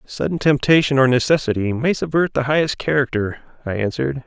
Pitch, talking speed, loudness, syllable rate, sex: 125 Hz, 155 wpm, -18 LUFS, 5.9 syllables/s, male